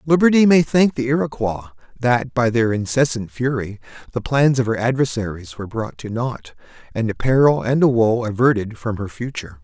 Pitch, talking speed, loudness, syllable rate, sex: 120 Hz, 180 wpm, -19 LUFS, 5.5 syllables/s, male